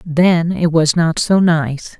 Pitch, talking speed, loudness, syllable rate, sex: 165 Hz, 180 wpm, -14 LUFS, 3.2 syllables/s, female